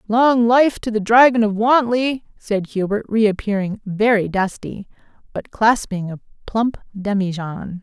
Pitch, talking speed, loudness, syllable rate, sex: 215 Hz, 130 wpm, -18 LUFS, 4.1 syllables/s, female